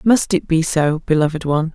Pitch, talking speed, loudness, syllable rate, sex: 165 Hz, 205 wpm, -17 LUFS, 5.5 syllables/s, female